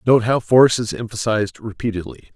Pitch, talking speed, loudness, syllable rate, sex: 110 Hz, 155 wpm, -18 LUFS, 5.9 syllables/s, male